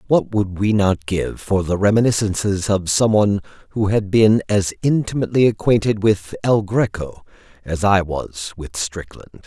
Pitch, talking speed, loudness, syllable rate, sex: 100 Hz, 150 wpm, -18 LUFS, 4.6 syllables/s, male